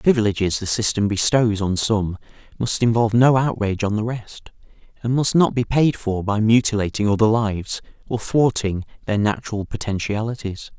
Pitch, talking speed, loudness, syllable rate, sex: 110 Hz, 160 wpm, -20 LUFS, 5.4 syllables/s, male